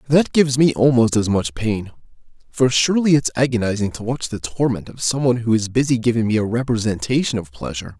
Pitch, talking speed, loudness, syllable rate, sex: 120 Hz, 195 wpm, -19 LUFS, 6.1 syllables/s, male